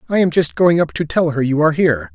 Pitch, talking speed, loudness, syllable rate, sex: 150 Hz, 310 wpm, -16 LUFS, 6.7 syllables/s, male